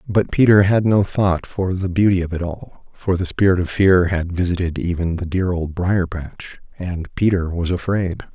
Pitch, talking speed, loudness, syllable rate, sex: 90 Hz, 200 wpm, -19 LUFS, 4.6 syllables/s, male